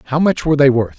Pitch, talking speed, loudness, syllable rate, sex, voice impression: 140 Hz, 305 wpm, -14 LUFS, 7.8 syllables/s, male, masculine, adult-like, slightly thick, cool, slightly intellectual, slightly calm